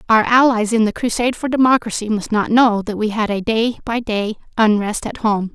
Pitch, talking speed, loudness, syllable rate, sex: 220 Hz, 215 wpm, -17 LUFS, 5.3 syllables/s, female